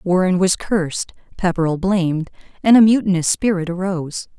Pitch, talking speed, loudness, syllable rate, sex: 180 Hz, 135 wpm, -18 LUFS, 5.4 syllables/s, female